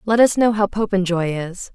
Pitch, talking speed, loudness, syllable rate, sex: 195 Hz, 205 wpm, -18 LUFS, 4.9 syllables/s, female